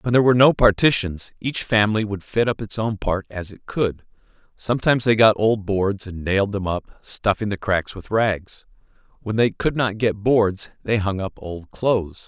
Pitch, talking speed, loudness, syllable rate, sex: 105 Hz, 200 wpm, -21 LUFS, 4.9 syllables/s, male